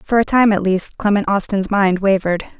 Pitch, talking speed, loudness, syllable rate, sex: 200 Hz, 210 wpm, -16 LUFS, 5.4 syllables/s, female